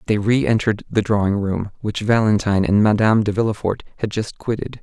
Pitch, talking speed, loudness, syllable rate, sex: 105 Hz, 175 wpm, -19 LUFS, 6.0 syllables/s, male